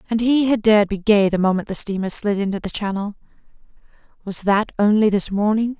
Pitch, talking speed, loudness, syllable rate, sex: 205 Hz, 195 wpm, -19 LUFS, 5.8 syllables/s, female